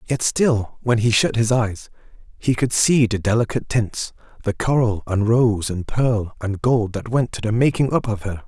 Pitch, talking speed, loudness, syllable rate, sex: 115 Hz, 205 wpm, -20 LUFS, 4.6 syllables/s, male